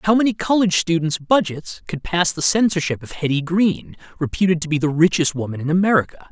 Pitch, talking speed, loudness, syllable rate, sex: 165 Hz, 190 wpm, -19 LUFS, 5.9 syllables/s, male